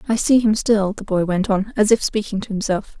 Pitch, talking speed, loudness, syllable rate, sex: 205 Hz, 260 wpm, -19 LUFS, 5.5 syllables/s, female